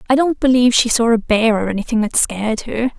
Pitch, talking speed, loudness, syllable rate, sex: 230 Hz, 240 wpm, -16 LUFS, 6.2 syllables/s, female